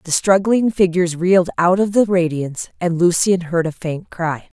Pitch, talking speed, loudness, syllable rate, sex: 175 Hz, 185 wpm, -17 LUFS, 5.0 syllables/s, female